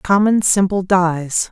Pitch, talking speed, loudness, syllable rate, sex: 185 Hz, 120 wpm, -15 LUFS, 3.4 syllables/s, female